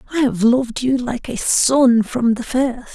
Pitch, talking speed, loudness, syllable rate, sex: 245 Hz, 205 wpm, -17 LUFS, 4.1 syllables/s, female